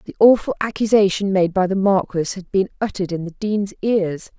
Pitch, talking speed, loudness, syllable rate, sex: 195 Hz, 190 wpm, -19 LUFS, 5.5 syllables/s, female